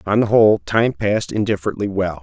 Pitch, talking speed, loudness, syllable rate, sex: 100 Hz, 190 wpm, -17 LUFS, 6.2 syllables/s, male